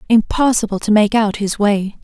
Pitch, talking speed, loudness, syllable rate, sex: 215 Hz, 175 wpm, -15 LUFS, 4.9 syllables/s, female